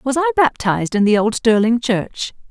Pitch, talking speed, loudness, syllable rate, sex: 235 Hz, 190 wpm, -17 LUFS, 5.1 syllables/s, female